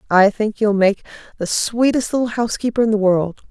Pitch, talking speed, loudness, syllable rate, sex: 215 Hz, 190 wpm, -18 LUFS, 5.6 syllables/s, female